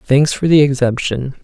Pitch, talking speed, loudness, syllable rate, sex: 140 Hz, 170 wpm, -14 LUFS, 4.7 syllables/s, male